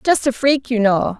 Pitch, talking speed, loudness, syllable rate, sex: 245 Hz, 250 wpm, -17 LUFS, 4.6 syllables/s, female